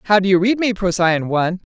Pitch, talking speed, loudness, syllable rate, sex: 190 Hz, 245 wpm, -17 LUFS, 6.1 syllables/s, female